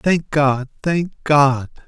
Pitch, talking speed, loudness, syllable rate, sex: 145 Hz, 130 wpm, -18 LUFS, 2.6 syllables/s, male